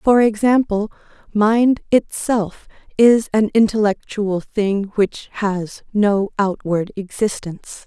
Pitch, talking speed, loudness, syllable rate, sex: 210 Hz, 100 wpm, -18 LUFS, 3.5 syllables/s, female